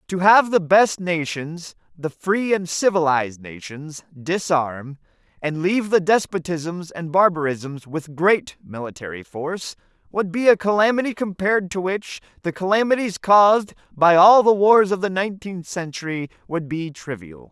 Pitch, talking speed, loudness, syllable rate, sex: 175 Hz, 145 wpm, -20 LUFS, 4.5 syllables/s, male